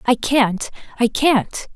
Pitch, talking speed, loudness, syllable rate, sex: 240 Hz, 100 wpm, -18 LUFS, 3.1 syllables/s, female